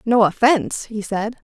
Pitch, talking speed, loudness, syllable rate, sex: 220 Hz, 155 wpm, -19 LUFS, 4.7 syllables/s, female